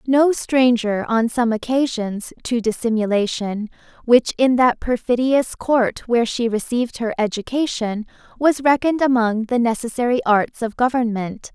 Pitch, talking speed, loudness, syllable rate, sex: 240 Hz, 130 wpm, -19 LUFS, 4.6 syllables/s, female